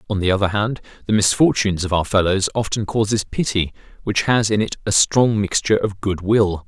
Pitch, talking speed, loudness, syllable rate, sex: 105 Hz, 200 wpm, -19 LUFS, 5.5 syllables/s, male